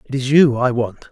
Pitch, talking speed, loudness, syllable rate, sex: 130 Hz, 270 wpm, -16 LUFS, 5.6 syllables/s, male